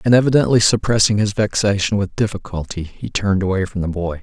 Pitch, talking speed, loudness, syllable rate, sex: 100 Hz, 185 wpm, -18 LUFS, 6.1 syllables/s, male